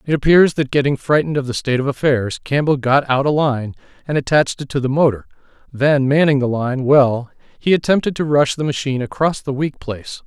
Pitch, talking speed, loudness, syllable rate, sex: 140 Hz, 205 wpm, -17 LUFS, 5.9 syllables/s, male